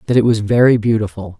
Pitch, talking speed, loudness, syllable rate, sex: 110 Hz, 170 wpm, -15 LUFS, 6.7 syllables/s, female